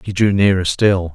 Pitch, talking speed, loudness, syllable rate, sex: 95 Hz, 210 wpm, -15 LUFS, 4.8 syllables/s, male